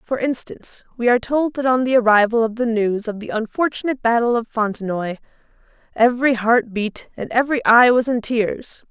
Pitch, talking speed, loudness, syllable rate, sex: 235 Hz, 180 wpm, -18 LUFS, 5.5 syllables/s, female